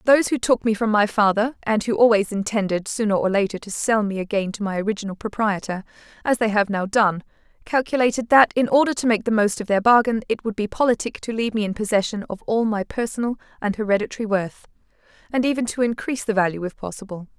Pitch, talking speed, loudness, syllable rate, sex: 215 Hz, 215 wpm, -21 LUFS, 6.3 syllables/s, female